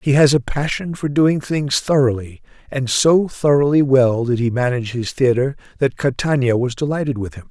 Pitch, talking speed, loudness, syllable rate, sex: 135 Hz, 185 wpm, -18 LUFS, 5.1 syllables/s, male